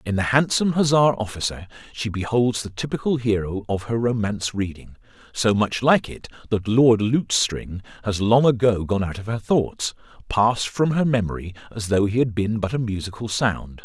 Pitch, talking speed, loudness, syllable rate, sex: 110 Hz, 180 wpm, -22 LUFS, 5.1 syllables/s, male